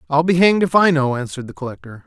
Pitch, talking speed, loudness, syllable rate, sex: 155 Hz, 260 wpm, -16 LUFS, 7.5 syllables/s, male